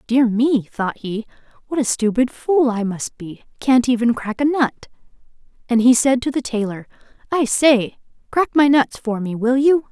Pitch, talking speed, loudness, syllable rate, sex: 245 Hz, 180 wpm, -18 LUFS, 4.5 syllables/s, female